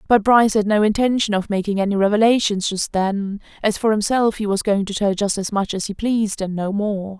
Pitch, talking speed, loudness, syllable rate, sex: 205 Hz, 225 wpm, -19 LUFS, 5.6 syllables/s, female